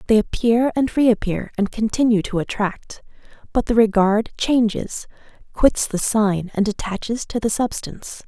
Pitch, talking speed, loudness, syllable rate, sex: 220 Hz, 145 wpm, -20 LUFS, 4.5 syllables/s, female